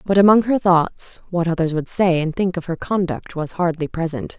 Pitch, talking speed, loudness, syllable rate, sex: 175 Hz, 220 wpm, -19 LUFS, 5.0 syllables/s, female